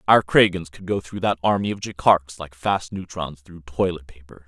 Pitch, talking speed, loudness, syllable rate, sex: 85 Hz, 200 wpm, -22 LUFS, 5.0 syllables/s, male